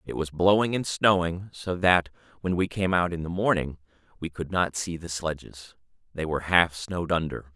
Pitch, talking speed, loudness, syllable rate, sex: 85 Hz, 200 wpm, -26 LUFS, 5.0 syllables/s, male